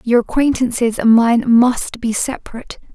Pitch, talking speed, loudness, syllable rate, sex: 240 Hz, 140 wpm, -15 LUFS, 4.8 syllables/s, female